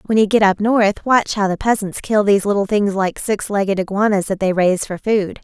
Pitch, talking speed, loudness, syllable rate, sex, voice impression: 200 Hz, 245 wpm, -17 LUFS, 5.5 syllables/s, female, very feminine, slightly young, very thin, very tensed, very powerful, very bright, soft, very clear, very fluent, slightly raspy, very cute, intellectual, very refreshing, sincere, calm, very friendly, very reassuring, very unique, very elegant, slightly wild, very sweet, very lively, very kind, slightly intense, very light